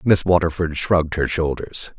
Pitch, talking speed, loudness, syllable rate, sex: 85 Hz, 150 wpm, -20 LUFS, 4.9 syllables/s, male